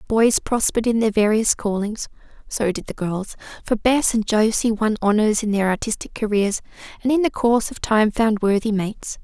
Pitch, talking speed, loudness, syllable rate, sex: 215 Hz, 195 wpm, -20 LUFS, 5.3 syllables/s, female